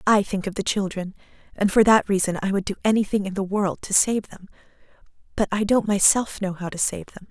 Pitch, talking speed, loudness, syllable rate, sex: 200 Hz, 230 wpm, -22 LUFS, 5.8 syllables/s, female